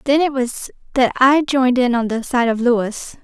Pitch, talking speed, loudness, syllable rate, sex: 255 Hz, 225 wpm, -17 LUFS, 4.7 syllables/s, female